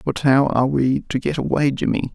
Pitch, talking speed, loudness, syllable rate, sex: 140 Hz, 225 wpm, -19 LUFS, 5.4 syllables/s, male